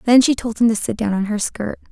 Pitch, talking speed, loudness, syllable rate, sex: 220 Hz, 315 wpm, -19 LUFS, 5.9 syllables/s, female